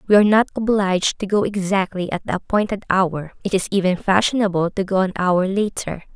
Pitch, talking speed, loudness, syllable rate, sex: 195 Hz, 195 wpm, -19 LUFS, 5.8 syllables/s, female